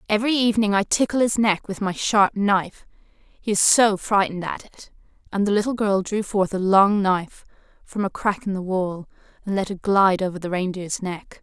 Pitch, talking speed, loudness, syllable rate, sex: 200 Hz, 205 wpm, -21 LUFS, 5.2 syllables/s, female